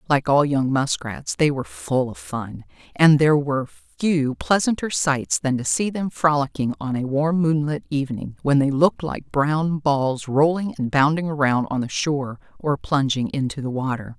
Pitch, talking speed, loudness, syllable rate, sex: 135 Hz, 180 wpm, -21 LUFS, 4.8 syllables/s, female